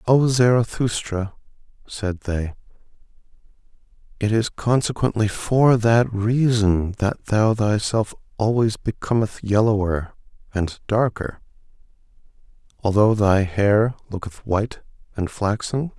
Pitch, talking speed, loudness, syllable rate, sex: 110 Hz, 95 wpm, -21 LUFS, 3.9 syllables/s, male